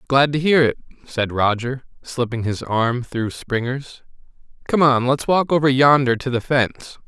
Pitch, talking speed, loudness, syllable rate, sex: 130 Hz, 170 wpm, -19 LUFS, 4.5 syllables/s, male